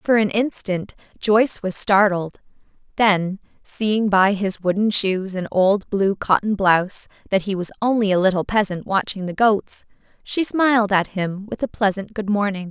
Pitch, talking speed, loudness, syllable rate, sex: 200 Hz, 170 wpm, -20 LUFS, 4.5 syllables/s, female